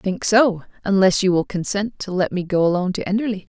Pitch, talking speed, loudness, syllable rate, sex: 190 Hz, 235 wpm, -20 LUFS, 6.2 syllables/s, female